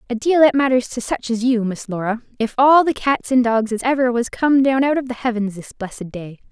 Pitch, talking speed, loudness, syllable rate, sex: 245 Hz, 260 wpm, -18 LUFS, 5.6 syllables/s, female